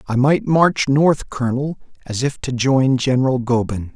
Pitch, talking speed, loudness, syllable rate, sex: 135 Hz, 165 wpm, -18 LUFS, 4.5 syllables/s, male